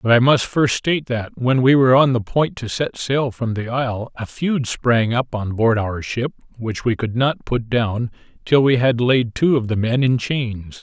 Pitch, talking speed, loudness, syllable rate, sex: 120 Hz, 235 wpm, -19 LUFS, 4.4 syllables/s, male